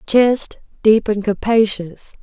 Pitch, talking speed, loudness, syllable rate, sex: 215 Hz, 80 wpm, -16 LUFS, 3.4 syllables/s, female